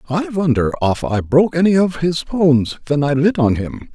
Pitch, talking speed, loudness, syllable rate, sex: 150 Hz, 215 wpm, -16 LUFS, 5.2 syllables/s, male